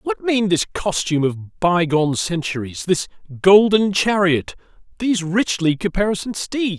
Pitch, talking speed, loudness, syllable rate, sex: 175 Hz, 115 wpm, -19 LUFS, 4.5 syllables/s, male